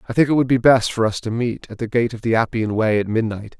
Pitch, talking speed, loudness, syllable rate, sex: 115 Hz, 315 wpm, -19 LUFS, 6.2 syllables/s, male